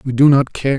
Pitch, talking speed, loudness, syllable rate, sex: 135 Hz, 305 wpm, -14 LUFS, 5.4 syllables/s, male